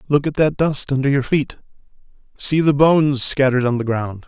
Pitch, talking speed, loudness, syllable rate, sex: 140 Hz, 195 wpm, -17 LUFS, 5.5 syllables/s, male